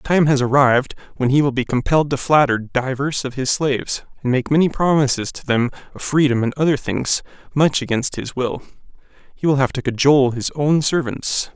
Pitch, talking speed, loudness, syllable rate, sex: 135 Hz, 190 wpm, -18 LUFS, 5.5 syllables/s, male